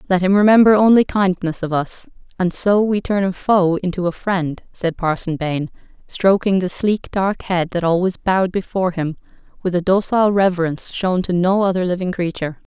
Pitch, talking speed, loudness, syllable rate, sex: 185 Hz, 185 wpm, -18 LUFS, 5.3 syllables/s, female